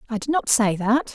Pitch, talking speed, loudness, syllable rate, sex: 230 Hz, 260 wpm, -21 LUFS, 5.2 syllables/s, female